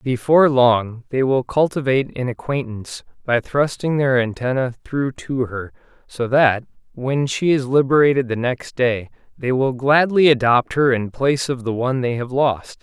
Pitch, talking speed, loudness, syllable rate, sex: 130 Hz, 170 wpm, -19 LUFS, 4.7 syllables/s, male